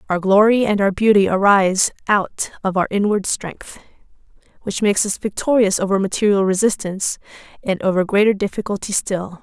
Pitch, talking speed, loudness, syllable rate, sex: 200 Hz, 145 wpm, -18 LUFS, 5.5 syllables/s, female